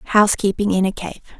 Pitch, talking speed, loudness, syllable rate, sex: 195 Hz, 170 wpm, -18 LUFS, 6.3 syllables/s, female